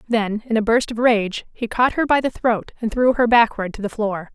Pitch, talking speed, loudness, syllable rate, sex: 225 Hz, 265 wpm, -19 LUFS, 5.0 syllables/s, female